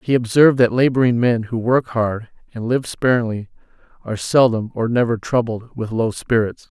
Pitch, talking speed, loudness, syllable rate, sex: 115 Hz, 170 wpm, -18 LUFS, 5.2 syllables/s, male